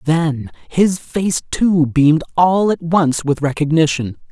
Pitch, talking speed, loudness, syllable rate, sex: 160 Hz, 140 wpm, -16 LUFS, 3.8 syllables/s, male